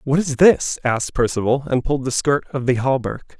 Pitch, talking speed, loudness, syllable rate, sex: 135 Hz, 210 wpm, -19 LUFS, 5.4 syllables/s, male